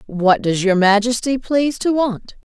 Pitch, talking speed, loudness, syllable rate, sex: 225 Hz, 165 wpm, -17 LUFS, 4.4 syllables/s, female